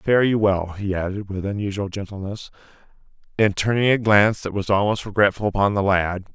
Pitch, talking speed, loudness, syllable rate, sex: 100 Hz, 180 wpm, -21 LUFS, 5.6 syllables/s, male